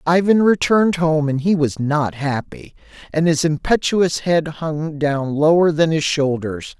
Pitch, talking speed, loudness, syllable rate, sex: 155 Hz, 160 wpm, -18 LUFS, 4.1 syllables/s, male